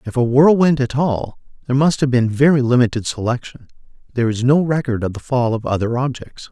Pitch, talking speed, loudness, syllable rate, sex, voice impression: 125 Hz, 205 wpm, -17 LUFS, 5.8 syllables/s, male, masculine, adult-like, slightly refreshing, slightly calm, slightly friendly, kind